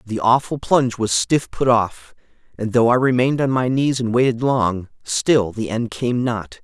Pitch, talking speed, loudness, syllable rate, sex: 120 Hz, 200 wpm, -19 LUFS, 4.6 syllables/s, male